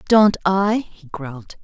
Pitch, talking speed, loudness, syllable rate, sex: 180 Hz, 145 wpm, -17 LUFS, 3.9 syllables/s, female